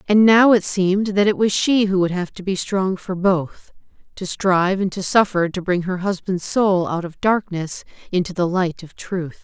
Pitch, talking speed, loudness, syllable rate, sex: 190 Hz, 215 wpm, -19 LUFS, 4.7 syllables/s, female